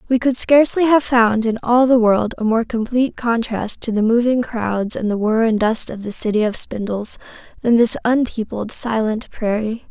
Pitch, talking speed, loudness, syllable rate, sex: 230 Hz, 195 wpm, -17 LUFS, 4.8 syllables/s, female